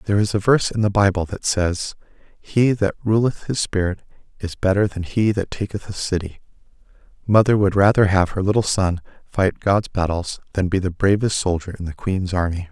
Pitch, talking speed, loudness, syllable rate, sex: 95 Hz, 195 wpm, -20 LUFS, 5.3 syllables/s, male